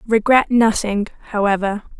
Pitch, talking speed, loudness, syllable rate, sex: 215 Hz, 90 wpm, -17 LUFS, 4.7 syllables/s, female